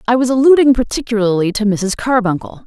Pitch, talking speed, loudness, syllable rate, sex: 220 Hz, 155 wpm, -14 LUFS, 6.0 syllables/s, female